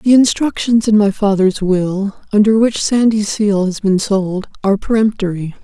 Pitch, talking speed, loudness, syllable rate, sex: 205 Hz, 150 wpm, -14 LUFS, 4.6 syllables/s, female